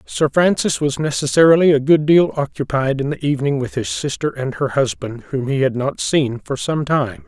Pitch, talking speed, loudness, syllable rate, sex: 140 Hz, 205 wpm, -18 LUFS, 5.1 syllables/s, male